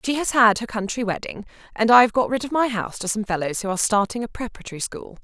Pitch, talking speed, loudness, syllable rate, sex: 225 Hz, 250 wpm, -21 LUFS, 6.9 syllables/s, female